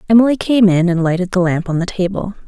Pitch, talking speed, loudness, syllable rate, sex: 190 Hz, 240 wpm, -15 LUFS, 6.4 syllables/s, female